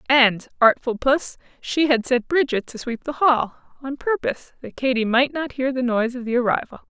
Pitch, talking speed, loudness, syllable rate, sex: 255 Hz, 200 wpm, -21 LUFS, 5.2 syllables/s, female